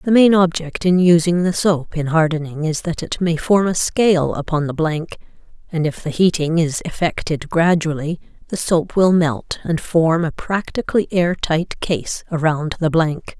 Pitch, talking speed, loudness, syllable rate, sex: 165 Hz, 180 wpm, -18 LUFS, 4.5 syllables/s, female